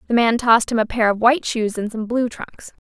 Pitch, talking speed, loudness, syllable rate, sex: 230 Hz, 270 wpm, -18 LUFS, 5.8 syllables/s, female